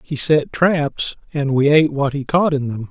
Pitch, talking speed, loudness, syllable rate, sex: 145 Hz, 225 wpm, -17 LUFS, 4.5 syllables/s, male